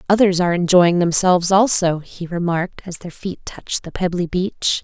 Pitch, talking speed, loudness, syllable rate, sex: 180 Hz, 175 wpm, -18 LUFS, 5.2 syllables/s, female